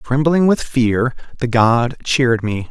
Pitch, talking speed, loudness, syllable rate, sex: 125 Hz, 155 wpm, -16 LUFS, 3.8 syllables/s, male